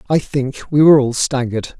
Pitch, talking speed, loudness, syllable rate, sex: 135 Hz, 200 wpm, -15 LUFS, 6.0 syllables/s, male